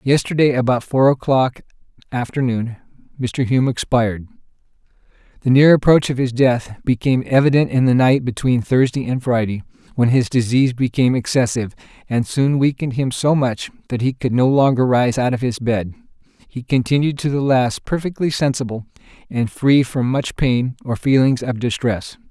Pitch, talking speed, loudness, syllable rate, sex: 130 Hz, 160 wpm, -17 LUFS, 5.2 syllables/s, male